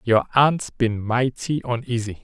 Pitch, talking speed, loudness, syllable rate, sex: 120 Hz, 135 wpm, -21 LUFS, 4.0 syllables/s, male